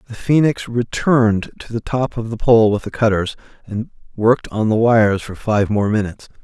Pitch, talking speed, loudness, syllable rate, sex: 115 Hz, 195 wpm, -17 LUFS, 5.3 syllables/s, male